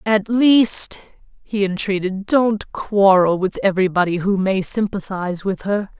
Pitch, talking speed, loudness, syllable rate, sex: 195 Hz, 130 wpm, -18 LUFS, 4.2 syllables/s, female